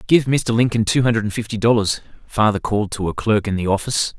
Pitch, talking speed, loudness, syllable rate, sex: 110 Hz, 230 wpm, -19 LUFS, 6.4 syllables/s, male